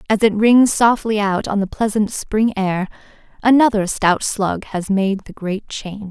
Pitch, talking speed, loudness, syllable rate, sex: 205 Hz, 175 wpm, -17 LUFS, 4.3 syllables/s, female